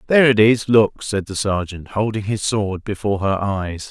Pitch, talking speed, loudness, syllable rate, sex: 105 Hz, 200 wpm, -19 LUFS, 4.9 syllables/s, male